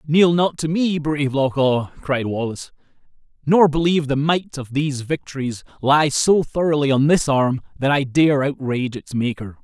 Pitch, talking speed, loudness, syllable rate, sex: 145 Hz, 175 wpm, -19 LUFS, 4.9 syllables/s, male